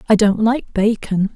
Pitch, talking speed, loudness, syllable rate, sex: 215 Hz, 175 wpm, -17 LUFS, 4.3 syllables/s, female